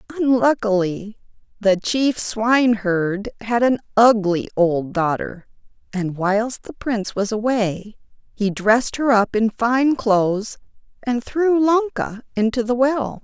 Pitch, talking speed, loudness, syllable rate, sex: 225 Hz, 125 wpm, -19 LUFS, 3.9 syllables/s, female